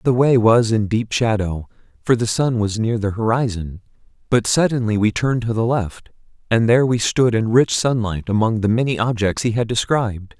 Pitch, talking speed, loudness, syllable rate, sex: 115 Hz, 195 wpm, -18 LUFS, 5.2 syllables/s, male